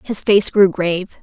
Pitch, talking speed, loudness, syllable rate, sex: 190 Hz, 195 wpm, -15 LUFS, 4.7 syllables/s, female